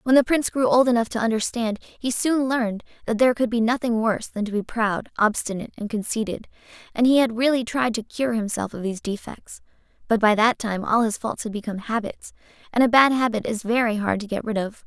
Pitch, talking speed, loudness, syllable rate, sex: 225 Hz, 225 wpm, -22 LUFS, 6.0 syllables/s, female